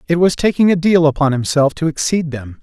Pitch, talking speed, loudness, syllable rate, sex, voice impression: 155 Hz, 230 wpm, -15 LUFS, 5.7 syllables/s, male, masculine, adult-like, thick, tensed, slightly powerful, bright, slightly muffled, slightly raspy, cool, intellectual, friendly, reassuring, wild, lively, slightly kind